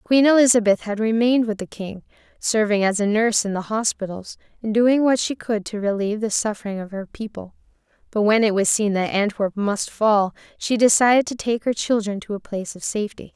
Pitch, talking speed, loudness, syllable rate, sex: 215 Hz, 205 wpm, -20 LUFS, 5.6 syllables/s, female